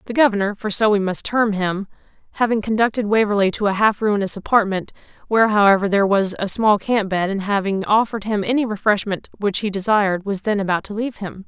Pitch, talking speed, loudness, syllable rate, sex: 205 Hz, 205 wpm, -19 LUFS, 6.1 syllables/s, female